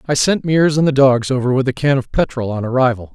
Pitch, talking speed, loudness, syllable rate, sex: 130 Hz, 265 wpm, -16 LUFS, 6.3 syllables/s, male